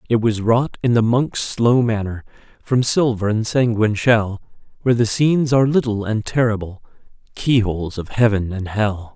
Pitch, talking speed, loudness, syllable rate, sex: 110 Hz, 165 wpm, -18 LUFS, 5.0 syllables/s, male